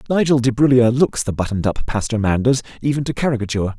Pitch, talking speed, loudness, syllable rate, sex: 120 Hz, 175 wpm, -18 LUFS, 6.8 syllables/s, male